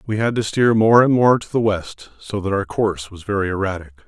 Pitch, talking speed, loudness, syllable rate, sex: 105 Hz, 250 wpm, -18 LUFS, 5.6 syllables/s, male